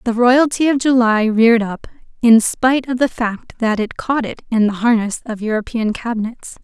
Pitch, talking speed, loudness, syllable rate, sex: 230 Hz, 190 wpm, -16 LUFS, 5.0 syllables/s, female